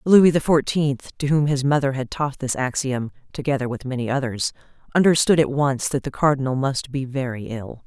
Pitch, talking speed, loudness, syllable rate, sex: 135 Hz, 190 wpm, -21 LUFS, 5.2 syllables/s, female